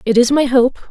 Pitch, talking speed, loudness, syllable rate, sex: 250 Hz, 265 wpm, -13 LUFS, 5.1 syllables/s, female